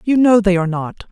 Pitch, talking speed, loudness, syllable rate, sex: 200 Hz, 270 wpm, -15 LUFS, 6.0 syllables/s, female